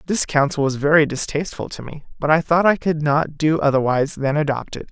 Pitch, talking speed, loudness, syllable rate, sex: 150 Hz, 220 wpm, -19 LUFS, 5.9 syllables/s, male